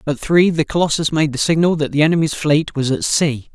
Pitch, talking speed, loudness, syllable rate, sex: 150 Hz, 235 wpm, -16 LUFS, 5.6 syllables/s, male